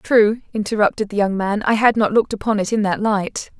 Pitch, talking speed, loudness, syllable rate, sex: 210 Hz, 235 wpm, -18 LUFS, 5.7 syllables/s, female